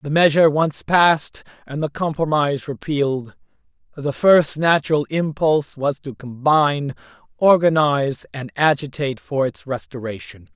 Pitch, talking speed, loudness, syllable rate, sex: 145 Hz, 120 wpm, -19 LUFS, 4.8 syllables/s, male